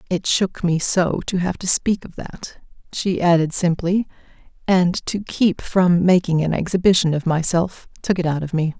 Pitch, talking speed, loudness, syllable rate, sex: 175 Hz, 185 wpm, -19 LUFS, 4.6 syllables/s, female